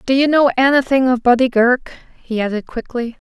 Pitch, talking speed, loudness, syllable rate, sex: 250 Hz, 180 wpm, -16 LUFS, 5.7 syllables/s, female